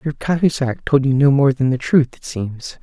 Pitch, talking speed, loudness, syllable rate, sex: 135 Hz, 235 wpm, -17 LUFS, 4.8 syllables/s, male